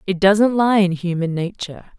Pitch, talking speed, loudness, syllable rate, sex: 190 Hz, 180 wpm, -17 LUFS, 5.1 syllables/s, female